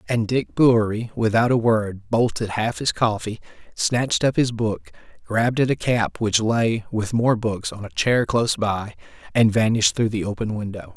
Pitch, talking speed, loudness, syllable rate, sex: 110 Hz, 185 wpm, -21 LUFS, 4.8 syllables/s, male